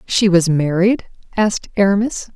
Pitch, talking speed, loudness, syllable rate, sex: 195 Hz, 125 wpm, -16 LUFS, 4.8 syllables/s, female